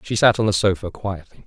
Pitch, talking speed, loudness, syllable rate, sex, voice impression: 95 Hz, 245 wpm, -20 LUFS, 5.8 syllables/s, male, masculine, adult-like, tensed, powerful, slightly bright, clear, fluent, cool, intellectual, calm, mature, friendly, slightly reassuring, wild, lively, kind